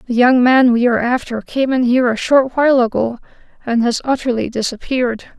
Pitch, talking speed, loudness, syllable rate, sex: 245 Hz, 190 wpm, -15 LUFS, 5.9 syllables/s, female